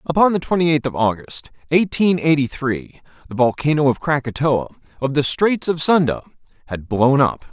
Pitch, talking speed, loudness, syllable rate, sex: 140 Hz, 170 wpm, -18 LUFS, 5.1 syllables/s, male